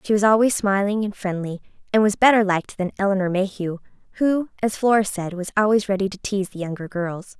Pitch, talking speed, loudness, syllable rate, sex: 200 Hz, 205 wpm, -21 LUFS, 6.0 syllables/s, female